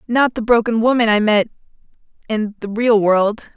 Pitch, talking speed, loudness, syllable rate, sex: 220 Hz, 150 wpm, -16 LUFS, 4.8 syllables/s, female